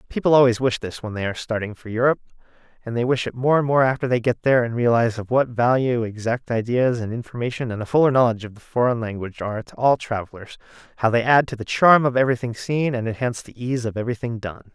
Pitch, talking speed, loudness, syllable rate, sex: 120 Hz, 235 wpm, -21 LUFS, 6.8 syllables/s, male